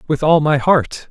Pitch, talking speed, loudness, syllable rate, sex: 150 Hz, 215 wpm, -15 LUFS, 4.3 syllables/s, male